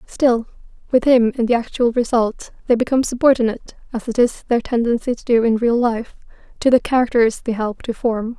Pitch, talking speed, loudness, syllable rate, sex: 235 Hz, 195 wpm, -18 LUFS, 5.5 syllables/s, female